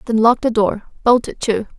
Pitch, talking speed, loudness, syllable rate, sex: 225 Hz, 235 wpm, -17 LUFS, 5.0 syllables/s, female